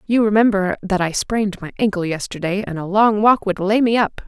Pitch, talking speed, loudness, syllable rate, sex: 200 Hz, 225 wpm, -18 LUFS, 5.5 syllables/s, female